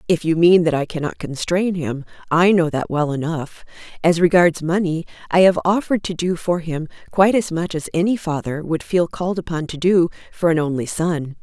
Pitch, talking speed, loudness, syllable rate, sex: 170 Hz, 205 wpm, -19 LUFS, 5.3 syllables/s, female